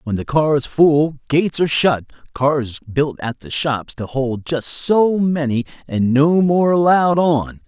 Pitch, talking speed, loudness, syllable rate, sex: 145 Hz, 170 wpm, -17 LUFS, 4.0 syllables/s, male